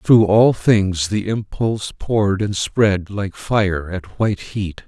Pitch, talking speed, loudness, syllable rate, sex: 100 Hz, 160 wpm, -18 LUFS, 3.6 syllables/s, male